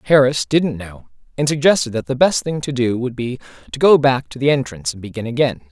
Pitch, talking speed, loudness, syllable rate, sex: 130 Hz, 230 wpm, -18 LUFS, 6.0 syllables/s, male